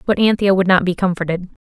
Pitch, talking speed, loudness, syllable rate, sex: 185 Hz, 215 wpm, -16 LUFS, 6.3 syllables/s, female